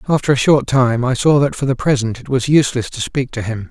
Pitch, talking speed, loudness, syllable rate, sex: 130 Hz, 275 wpm, -16 LUFS, 6.0 syllables/s, male